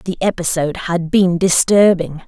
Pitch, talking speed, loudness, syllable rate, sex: 180 Hz, 130 wpm, -15 LUFS, 4.6 syllables/s, female